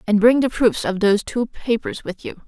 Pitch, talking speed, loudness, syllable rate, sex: 225 Hz, 245 wpm, -19 LUFS, 5.2 syllables/s, female